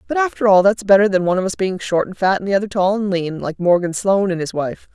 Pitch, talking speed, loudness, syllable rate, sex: 190 Hz, 305 wpm, -17 LUFS, 6.5 syllables/s, female